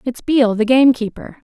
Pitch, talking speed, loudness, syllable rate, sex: 245 Hz, 155 wpm, -15 LUFS, 5.9 syllables/s, female